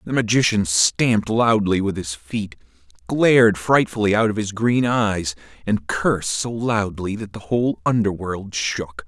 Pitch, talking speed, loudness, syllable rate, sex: 105 Hz, 150 wpm, -20 LUFS, 4.3 syllables/s, male